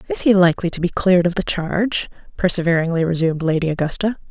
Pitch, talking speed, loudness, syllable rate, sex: 175 Hz, 180 wpm, -18 LUFS, 6.9 syllables/s, female